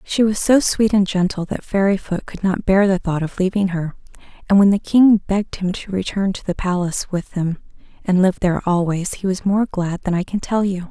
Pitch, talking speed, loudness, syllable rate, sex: 190 Hz, 230 wpm, -18 LUFS, 5.3 syllables/s, female